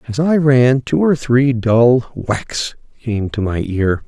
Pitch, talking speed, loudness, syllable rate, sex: 125 Hz, 175 wpm, -16 LUFS, 3.4 syllables/s, male